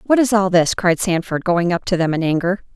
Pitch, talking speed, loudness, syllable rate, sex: 185 Hz, 260 wpm, -17 LUFS, 5.5 syllables/s, female